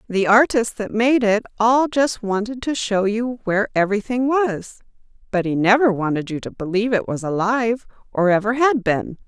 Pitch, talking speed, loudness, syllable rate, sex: 220 Hz, 180 wpm, -19 LUFS, 5.1 syllables/s, female